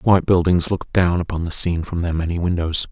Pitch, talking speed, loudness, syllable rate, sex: 85 Hz, 245 wpm, -19 LUFS, 6.3 syllables/s, male